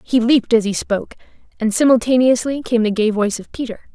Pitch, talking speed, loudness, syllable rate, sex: 235 Hz, 200 wpm, -17 LUFS, 6.3 syllables/s, female